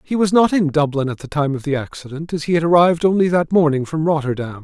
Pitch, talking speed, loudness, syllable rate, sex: 155 Hz, 260 wpm, -17 LUFS, 6.4 syllables/s, male